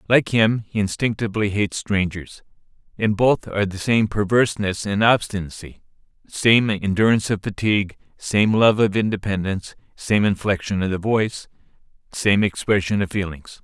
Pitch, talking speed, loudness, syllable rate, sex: 100 Hz, 135 wpm, -20 LUFS, 5.2 syllables/s, male